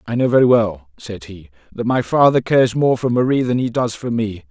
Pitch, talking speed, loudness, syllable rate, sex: 115 Hz, 240 wpm, -17 LUFS, 5.4 syllables/s, male